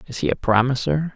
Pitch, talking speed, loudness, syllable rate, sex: 120 Hz, 210 wpm, -20 LUFS, 5.9 syllables/s, male